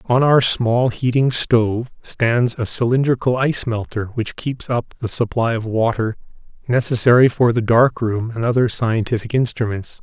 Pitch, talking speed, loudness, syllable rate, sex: 120 Hz, 155 wpm, -18 LUFS, 4.7 syllables/s, male